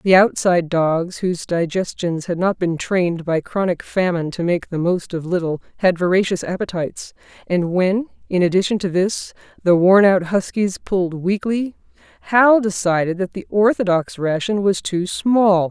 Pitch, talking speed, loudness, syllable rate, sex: 185 Hz, 160 wpm, -19 LUFS, 4.8 syllables/s, female